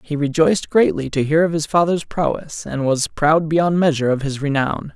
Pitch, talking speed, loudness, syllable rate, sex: 155 Hz, 205 wpm, -18 LUFS, 5.2 syllables/s, male